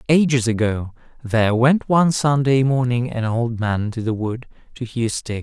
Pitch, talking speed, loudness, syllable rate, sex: 120 Hz, 175 wpm, -19 LUFS, 4.8 syllables/s, male